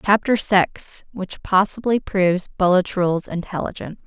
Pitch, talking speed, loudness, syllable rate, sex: 190 Hz, 90 wpm, -20 LUFS, 4.8 syllables/s, female